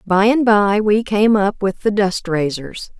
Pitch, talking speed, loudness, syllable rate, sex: 205 Hz, 200 wpm, -16 LUFS, 3.9 syllables/s, female